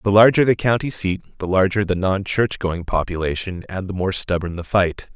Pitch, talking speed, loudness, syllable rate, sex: 95 Hz, 210 wpm, -20 LUFS, 5.0 syllables/s, male